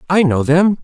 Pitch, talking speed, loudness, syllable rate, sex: 165 Hz, 215 wpm, -14 LUFS, 4.6 syllables/s, male